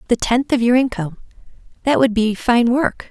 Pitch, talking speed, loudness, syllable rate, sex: 235 Hz, 175 wpm, -17 LUFS, 5.3 syllables/s, female